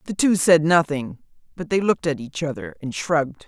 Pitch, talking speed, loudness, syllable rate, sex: 160 Hz, 205 wpm, -21 LUFS, 5.6 syllables/s, female